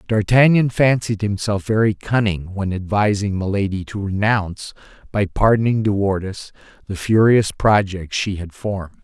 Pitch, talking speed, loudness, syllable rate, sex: 105 Hz, 135 wpm, -18 LUFS, 4.7 syllables/s, male